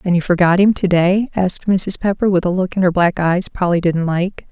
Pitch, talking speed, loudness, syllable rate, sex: 180 Hz, 250 wpm, -16 LUFS, 5.3 syllables/s, female